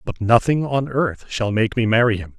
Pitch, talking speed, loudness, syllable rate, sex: 115 Hz, 225 wpm, -19 LUFS, 4.9 syllables/s, male